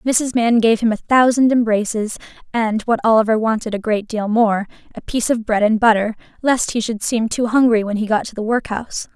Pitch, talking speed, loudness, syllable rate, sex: 225 Hz, 215 wpm, -17 LUFS, 5.5 syllables/s, female